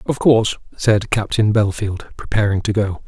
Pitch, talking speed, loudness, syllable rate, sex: 105 Hz, 155 wpm, -18 LUFS, 5.0 syllables/s, male